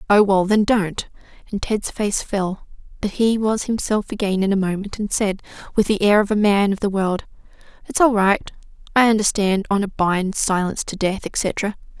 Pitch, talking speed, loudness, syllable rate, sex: 200 Hz, 175 wpm, -20 LUFS, 4.9 syllables/s, female